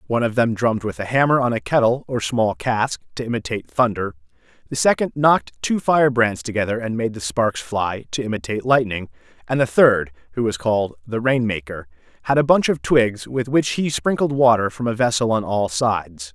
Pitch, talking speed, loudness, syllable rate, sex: 115 Hz, 205 wpm, -20 LUFS, 5.5 syllables/s, male